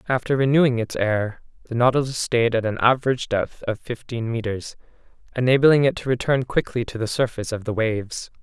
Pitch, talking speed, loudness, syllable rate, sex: 120 Hz, 180 wpm, -22 LUFS, 5.8 syllables/s, male